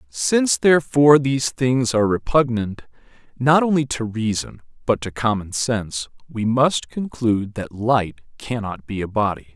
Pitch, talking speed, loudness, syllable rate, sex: 120 Hz, 145 wpm, -20 LUFS, 4.8 syllables/s, male